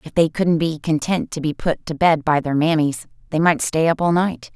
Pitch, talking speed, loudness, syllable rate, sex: 160 Hz, 250 wpm, -19 LUFS, 5.0 syllables/s, female